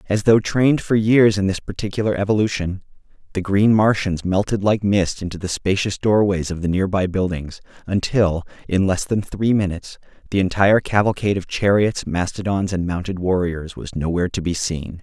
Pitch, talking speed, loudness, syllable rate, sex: 95 Hz, 170 wpm, -19 LUFS, 5.3 syllables/s, male